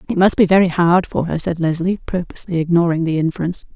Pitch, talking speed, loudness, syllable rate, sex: 175 Hz, 210 wpm, -17 LUFS, 6.7 syllables/s, female